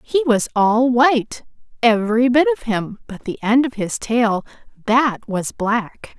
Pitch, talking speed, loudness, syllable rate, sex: 235 Hz, 165 wpm, -18 LUFS, 4.0 syllables/s, female